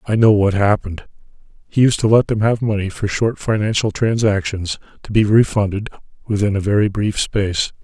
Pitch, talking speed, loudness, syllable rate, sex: 105 Hz, 160 wpm, -17 LUFS, 5.5 syllables/s, male